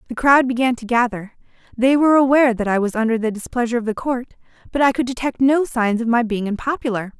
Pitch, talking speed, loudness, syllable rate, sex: 240 Hz, 225 wpm, -18 LUFS, 6.3 syllables/s, female